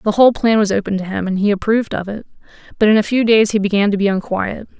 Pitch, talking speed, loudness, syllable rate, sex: 205 Hz, 275 wpm, -16 LUFS, 7.1 syllables/s, female